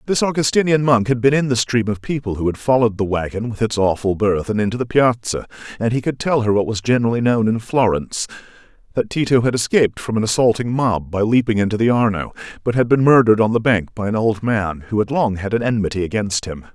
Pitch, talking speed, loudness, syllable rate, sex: 115 Hz, 230 wpm, -18 LUFS, 6.3 syllables/s, male